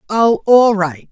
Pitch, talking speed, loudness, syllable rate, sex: 200 Hz, 160 wpm, -13 LUFS, 3.4 syllables/s, female